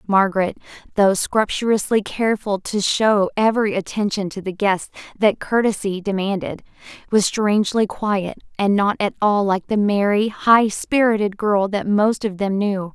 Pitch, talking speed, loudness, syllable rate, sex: 205 Hz, 150 wpm, -19 LUFS, 4.6 syllables/s, female